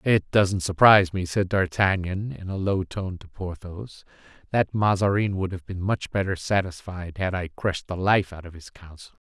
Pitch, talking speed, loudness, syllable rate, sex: 95 Hz, 190 wpm, -24 LUFS, 5.0 syllables/s, male